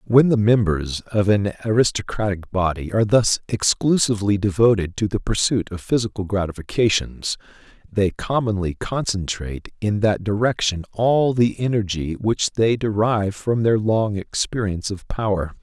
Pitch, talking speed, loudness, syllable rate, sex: 105 Hz, 135 wpm, -21 LUFS, 4.8 syllables/s, male